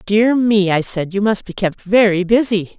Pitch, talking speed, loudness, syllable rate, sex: 205 Hz, 215 wpm, -16 LUFS, 4.5 syllables/s, female